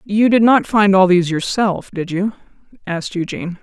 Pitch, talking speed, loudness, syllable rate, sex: 195 Hz, 180 wpm, -16 LUFS, 5.4 syllables/s, female